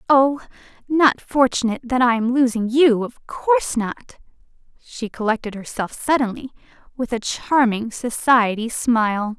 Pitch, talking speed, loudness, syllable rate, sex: 245 Hz, 130 wpm, -19 LUFS, 4.5 syllables/s, female